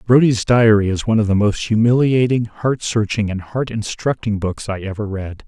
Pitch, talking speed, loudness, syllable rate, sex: 110 Hz, 185 wpm, -17 LUFS, 5.1 syllables/s, male